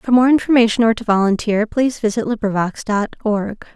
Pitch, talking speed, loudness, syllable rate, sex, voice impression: 220 Hz, 175 wpm, -17 LUFS, 5.7 syllables/s, female, very feminine, slightly young, very adult-like, very thin, tensed, slightly powerful, very bright, slightly soft, very clear, fluent, very cute, slightly intellectual, very refreshing, sincere, calm, friendly, slightly reassuring, very unique, elegant, slightly wild, very sweet, very lively, very kind, slightly intense, sharp, very light